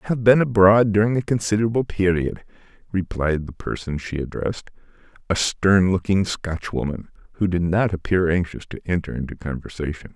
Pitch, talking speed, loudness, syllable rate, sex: 95 Hz, 155 wpm, -21 LUFS, 5.5 syllables/s, male